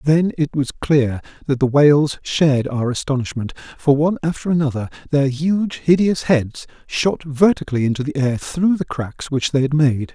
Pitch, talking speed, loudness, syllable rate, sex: 145 Hz, 175 wpm, -18 LUFS, 5.0 syllables/s, male